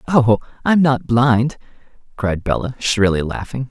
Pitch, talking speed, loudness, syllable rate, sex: 120 Hz, 130 wpm, -17 LUFS, 4.1 syllables/s, male